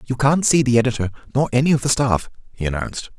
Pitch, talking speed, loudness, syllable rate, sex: 125 Hz, 225 wpm, -19 LUFS, 6.5 syllables/s, male